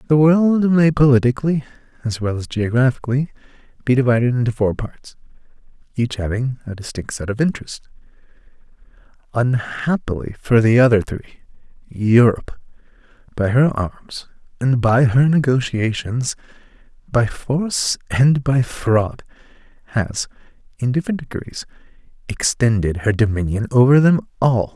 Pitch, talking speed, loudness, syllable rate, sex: 125 Hz, 115 wpm, -18 LUFS, 4.9 syllables/s, male